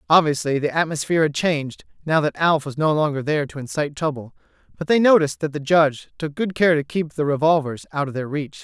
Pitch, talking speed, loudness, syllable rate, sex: 150 Hz, 220 wpm, -20 LUFS, 6.2 syllables/s, male